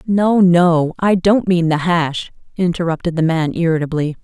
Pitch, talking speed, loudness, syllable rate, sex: 170 Hz, 155 wpm, -15 LUFS, 4.5 syllables/s, female